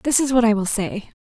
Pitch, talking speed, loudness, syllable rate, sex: 230 Hz, 295 wpm, -19 LUFS, 5.6 syllables/s, female